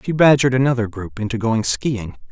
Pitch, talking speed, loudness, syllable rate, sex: 120 Hz, 180 wpm, -18 LUFS, 5.8 syllables/s, male